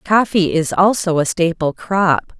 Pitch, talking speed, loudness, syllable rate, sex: 180 Hz, 150 wpm, -16 LUFS, 4.0 syllables/s, female